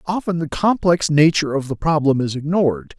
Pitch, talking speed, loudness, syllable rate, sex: 155 Hz, 180 wpm, -18 LUFS, 5.6 syllables/s, male